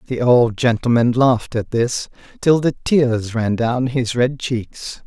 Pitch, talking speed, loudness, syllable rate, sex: 120 Hz, 165 wpm, -18 LUFS, 3.7 syllables/s, male